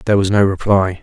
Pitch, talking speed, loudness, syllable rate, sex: 100 Hz, 235 wpm, -15 LUFS, 6.7 syllables/s, male